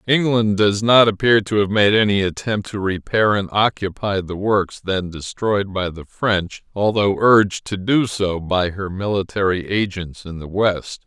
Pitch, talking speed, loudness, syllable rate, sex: 100 Hz, 175 wpm, -18 LUFS, 4.3 syllables/s, male